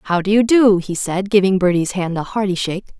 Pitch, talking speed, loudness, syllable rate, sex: 190 Hz, 240 wpm, -16 LUFS, 5.5 syllables/s, female